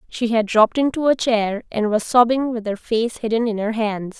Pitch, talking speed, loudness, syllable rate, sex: 225 Hz, 230 wpm, -19 LUFS, 5.1 syllables/s, female